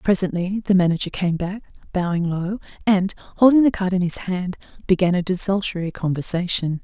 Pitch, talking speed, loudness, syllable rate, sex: 185 Hz, 160 wpm, -21 LUFS, 5.5 syllables/s, female